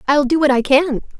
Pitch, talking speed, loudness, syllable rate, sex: 280 Hz, 250 wpm, -15 LUFS, 5.7 syllables/s, female